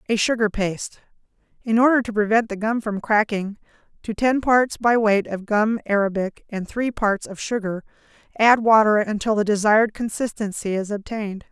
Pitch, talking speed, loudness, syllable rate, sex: 215 Hz, 160 wpm, -21 LUFS, 5.2 syllables/s, female